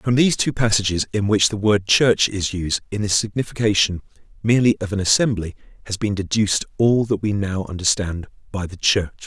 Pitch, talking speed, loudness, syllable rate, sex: 105 Hz, 190 wpm, -19 LUFS, 5.5 syllables/s, male